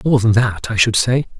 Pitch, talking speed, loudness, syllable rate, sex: 115 Hz, 260 wpm, -15 LUFS, 5.0 syllables/s, male